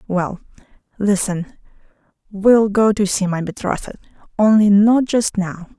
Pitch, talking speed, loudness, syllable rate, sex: 200 Hz, 125 wpm, -17 LUFS, 4.2 syllables/s, female